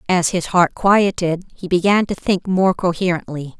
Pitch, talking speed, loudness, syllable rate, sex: 180 Hz, 165 wpm, -17 LUFS, 4.6 syllables/s, female